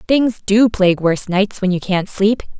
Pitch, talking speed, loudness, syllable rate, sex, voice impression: 200 Hz, 210 wpm, -16 LUFS, 4.6 syllables/s, female, very feminine, very young, very thin, slightly tensed, slightly weak, bright, soft, clear, fluent, slightly raspy, very cute, intellectual, very refreshing, sincere, calm, very friendly, very reassuring, unique, very elegant, slightly wild, sweet, very lively, very kind, sharp, slightly modest, light